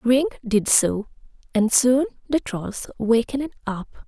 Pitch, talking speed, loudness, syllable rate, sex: 245 Hz, 135 wpm, -22 LUFS, 4.1 syllables/s, female